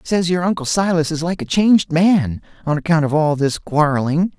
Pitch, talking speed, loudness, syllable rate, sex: 165 Hz, 205 wpm, -17 LUFS, 5.2 syllables/s, male